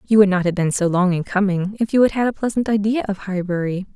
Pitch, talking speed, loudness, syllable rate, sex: 200 Hz, 275 wpm, -19 LUFS, 6.2 syllables/s, female